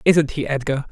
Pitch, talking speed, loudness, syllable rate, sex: 140 Hz, 195 wpm, -21 LUFS, 5.3 syllables/s, male